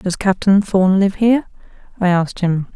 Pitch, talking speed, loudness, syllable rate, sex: 190 Hz, 175 wpm, -16 LUFS, 5.1 syllables/s, female